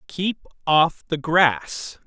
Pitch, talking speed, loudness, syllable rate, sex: 160 Hz, 115 wpm, -21 LUFS, 2.7 syllables/s, male